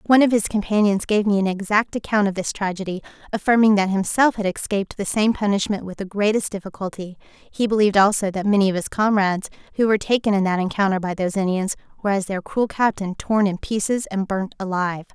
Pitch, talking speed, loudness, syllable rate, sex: 200 Hz, 205 wpm, -21 LUFS, 6.3 syllables/s, female